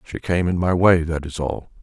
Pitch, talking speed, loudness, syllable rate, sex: 85 Hz, 265 wpm, -20 LUFS, 4.9 syllables/s, male